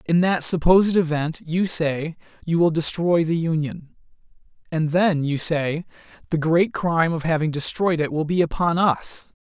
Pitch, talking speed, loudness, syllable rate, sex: 165 Hz, 165 wpm, -21 LUFS, 4.6 syllables/s, male